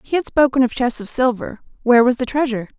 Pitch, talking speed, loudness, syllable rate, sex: 250 Hz, 215 wpm, -17 LUFS, 6.6 syllables/s, female